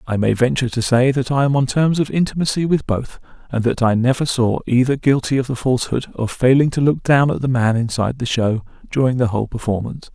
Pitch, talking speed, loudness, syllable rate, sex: 125 Hz, 230 wpm, -18 LUFS, 6.1 syllables/s, male